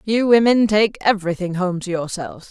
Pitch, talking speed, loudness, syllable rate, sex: 200 Hz, 170 wpm, -18 LUFS, 5.5 syllables/s, female